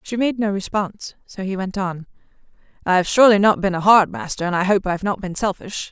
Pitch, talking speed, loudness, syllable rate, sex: 195 Hz, 215 wpm, -19 LUFS, 6.1 syllables/s, female